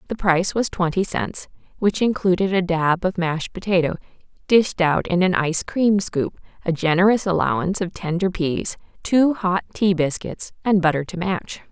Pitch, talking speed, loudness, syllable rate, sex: 180 Hz, 170 wpm, -21 LUFS, 4.8 syllables/s, female